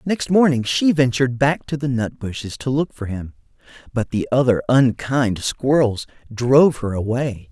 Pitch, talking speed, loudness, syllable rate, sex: 125 Hz, 170 wpm, -19 LUFS, 4.6 syllables/s, male